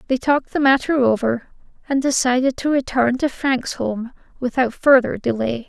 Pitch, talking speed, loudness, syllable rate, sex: 255 Hz, 160 wpm, -19 LUFS, 5.0 syllables/s, female